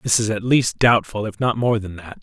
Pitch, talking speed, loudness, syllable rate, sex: 110 Hz, 270 wpm, -19 LUFS, 5.1 syllables/s, male